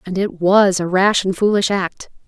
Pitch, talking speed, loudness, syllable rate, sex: 190 Hz, 210 wpm, -16 LUFS, 4.5 syllables/s, female